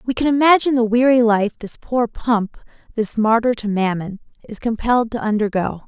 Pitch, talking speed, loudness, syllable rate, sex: 230 Hz, 175 wpm, -18 LUFS, 5.3 syllables/s, female